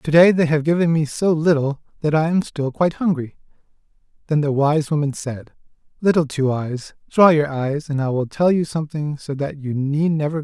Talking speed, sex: 225 wpm, male